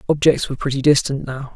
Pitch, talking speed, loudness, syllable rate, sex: 140 Hz, 195 wpm, -18 LUFS, 6.6 syllables/s, male